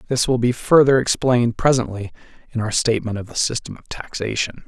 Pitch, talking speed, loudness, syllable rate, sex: 120 Hz, 180 wpm, -19 LUFS, 6.0 syllables/s, male